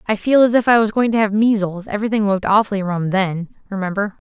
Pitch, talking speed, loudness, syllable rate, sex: 205 Hz, 225 wpm, -17 LUFS, 6.4 syllables/s, female